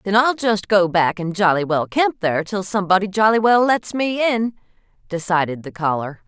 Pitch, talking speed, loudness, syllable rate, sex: 195 Hz, 190 wpm, -18 LUFS, 5.2 syllables/s, female